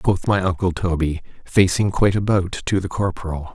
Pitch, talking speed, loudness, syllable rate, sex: 95 Hz, 170 wpm, -20 LUFS, 5.2 syllables/s, male